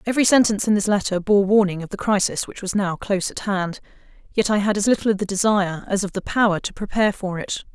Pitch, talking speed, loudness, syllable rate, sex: 200 Hz, 250 wpm, -21 LUFS, 6.6 syllables/s, female